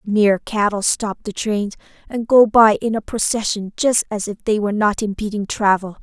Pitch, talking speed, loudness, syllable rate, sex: 210 Hz, 190 wpm, -18 LUFS, 5.0 syllables/s, female